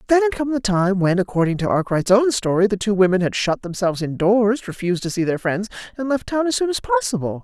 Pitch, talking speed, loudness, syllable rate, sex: 205 Hz, 240 wpm, -19 LUFS, 6.1 syllables/s, female